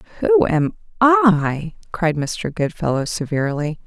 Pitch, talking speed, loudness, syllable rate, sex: 180 Hz, 110 wpm, -19 LUFS, 4.0 syllables/s, female